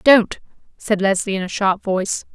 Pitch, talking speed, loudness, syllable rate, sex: 200 Hz, 180 wpm, -19 LUFS, 4.9 syllables/s, female